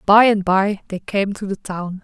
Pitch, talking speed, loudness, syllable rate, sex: 195 Hz, 235 wpm, -19 LUFS, 4.4 syllables/s, female